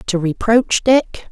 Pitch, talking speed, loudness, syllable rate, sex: 215 Hz, 135 wpm, -15 LUFS, 3.4 syllables/s, female